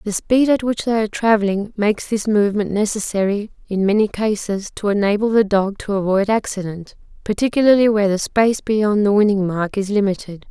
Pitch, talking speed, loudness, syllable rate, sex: 205 Hz, 175 wpm, -18 LUFS, 5.7 syllables/s, female